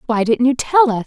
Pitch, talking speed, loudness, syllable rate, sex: 245 Hz, 280 wpm, -15 LUFS, 5.5 syllables/s, female